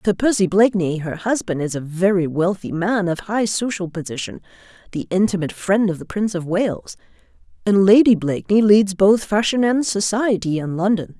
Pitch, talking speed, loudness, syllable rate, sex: 195 Hz, 170 wpm, -18 LUFS, 5.3 syllables/s, female